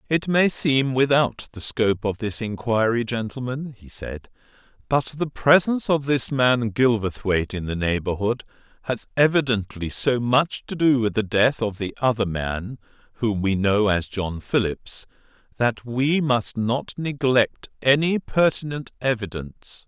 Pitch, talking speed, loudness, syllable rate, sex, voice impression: 120 Hz, 150 wpm, -22 LUFS, 4.3 syllables/s, male, masculine, adult-like, tensed, clear, fluent, intellectual, sincere, slightly mature, slightly elegant, wild, slightly strict